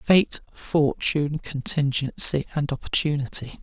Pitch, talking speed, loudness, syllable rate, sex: 145 Hz, 85 wpm, -23 LUFS, 4.1 syllables/s, male